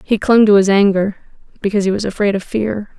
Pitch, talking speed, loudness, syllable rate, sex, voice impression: 205 Hz, 200 wpm, -15 LUFS, 6.1 syllables/s, female, very feminine, slightly young, thin, very tensed, powerful, dark, hard, very clear, very fluent, cute, intellectual, very refreshing, sincere, calm, very friendly, very reassuring, unique, elegant, slightly wild, sweet, strict, intense, slightly sharp, slightly light